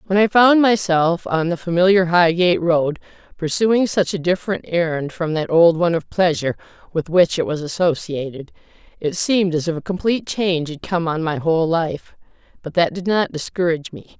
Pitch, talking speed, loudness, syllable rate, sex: 170 Hz, 185 wpm, -18 LUFS, 5.4 syllables/s, female